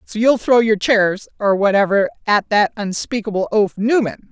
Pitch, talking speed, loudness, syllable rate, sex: 210 Hz, 165 wpm, -17 LUFS, 4.7 syllables/s, female